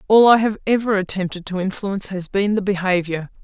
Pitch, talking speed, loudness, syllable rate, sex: 195 Hz, 190 wpm, -19 LUFS, 5.8 syllables/s, female